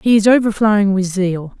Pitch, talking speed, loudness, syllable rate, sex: 200 Hz, 190 wpm, -14 LUFS, 5.3 syllables/s, female